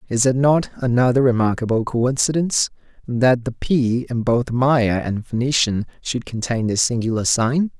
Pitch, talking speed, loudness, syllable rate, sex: 125 Hz, 145 wpm, -19 LUFS, 4.6 syllables/s, male